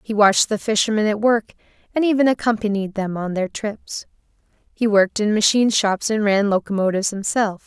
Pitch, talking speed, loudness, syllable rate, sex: 210 Hz, 170 wpm, -19 LUFS, 5.8 syllables/s, female